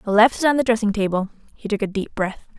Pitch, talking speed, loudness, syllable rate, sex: 210 Hz, 255 wpm, -20 LUFS, 6.0 syllables/s, female